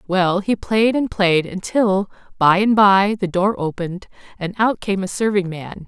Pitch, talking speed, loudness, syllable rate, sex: 195 Hz, 185 wpm, -18 LUFS, 4.4 syllables/s, female